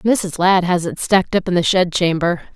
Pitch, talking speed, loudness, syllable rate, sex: 180 Hz, 235 wpm, -17 LUFS, 4.9 syllables/s, female